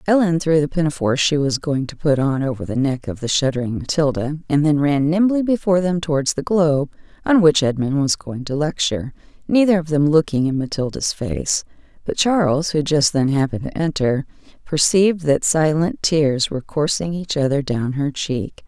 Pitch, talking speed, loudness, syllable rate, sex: 150 Hz, 190 wpm, -19 LUFS, 5.3 syllables/s, female